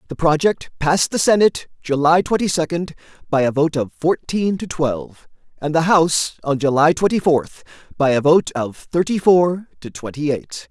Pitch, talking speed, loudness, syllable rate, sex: 155 Hz, 175 wpm, -18 LUFS, 5.0 syllables/s, male